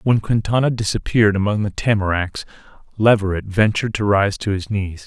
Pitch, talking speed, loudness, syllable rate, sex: 105 Hz, 155 wpm, -19 LUFS, 5.6 syllables/s, male